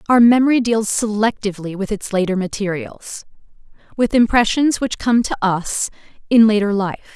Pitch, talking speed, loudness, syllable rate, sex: 215 Hz, 145 wpm, -17 LUFS, 5.1 syllables/s, female